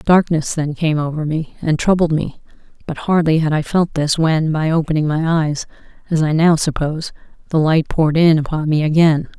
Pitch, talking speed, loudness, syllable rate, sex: 160 Hz, 190 wpm, -17 LUFS, 5.2 syllables/s, female